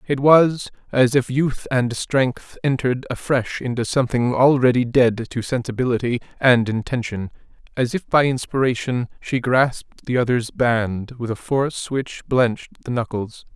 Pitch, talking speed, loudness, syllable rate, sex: 125 Hz, 145 wpm, -20 LUFS, 4.6 syllables/s, male